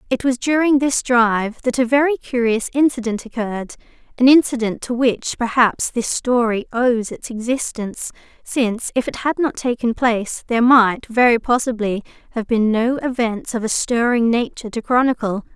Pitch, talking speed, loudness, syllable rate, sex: 240 Hz, 160 wpm, -18 LUFS, 5.0 syllables/s, female